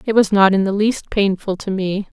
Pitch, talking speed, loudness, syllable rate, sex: 200 Hz, 245 wpm, -17 LUFS, 5.0 syllables/s, female